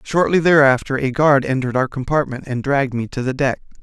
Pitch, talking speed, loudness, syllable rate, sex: 135 Hz, 205 wpm, -17 LUFS, 5.9 syllables/s, male